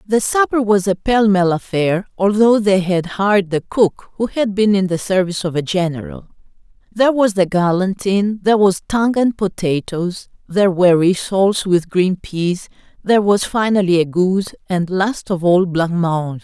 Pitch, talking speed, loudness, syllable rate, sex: 190 Hz, 170 wpm, -16 LUFS, 4.9 syllables/s, female